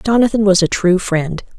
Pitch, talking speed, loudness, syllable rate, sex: 195 Hz, 190 wpm, -14 LUFS, 4.9 syllables/s, female